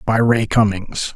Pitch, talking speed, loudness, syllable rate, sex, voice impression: 110 Hz, 155 wpm, -17 LUFS, 3.9 syllables/s, male, very masculine, middle-aged, thick, sincere, slightly mature, slightly wild